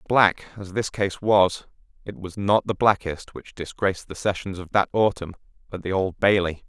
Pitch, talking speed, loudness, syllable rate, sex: 95 Hz, 190 wpm, -23 LUFS, 4.9 syllables/s, male